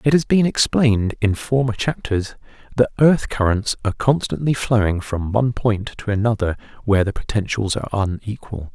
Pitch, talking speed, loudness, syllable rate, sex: 110 Hz, 160 wpm, -20 LUFS, 5.3 syllables/s, male